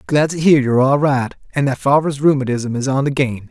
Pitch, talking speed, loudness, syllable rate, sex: 135 Hz, 240 wpm, -16 LUFS, 5.5 syllables/s, male